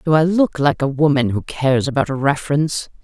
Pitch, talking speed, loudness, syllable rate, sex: 145 Hz, 215 wpm, -17 LUFS, 6.0 syllables/s, female